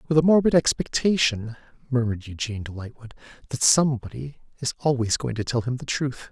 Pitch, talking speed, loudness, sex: 125 Hz, 170 wpm, -23 LUFS, male